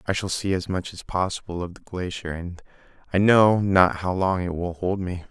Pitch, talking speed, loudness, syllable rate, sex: 95 Hz, 225 wpm, -23 LUFS, 5.0 syllables/s, male